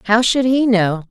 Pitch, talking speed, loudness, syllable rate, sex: 220 Hz, 220 wpm, -15 LUFS, 4.4 syllables/s, female